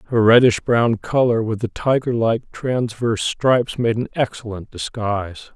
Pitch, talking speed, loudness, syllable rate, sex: 115 Hz, 150 wpm, -19 LUFS, 4.6 syllables/s, male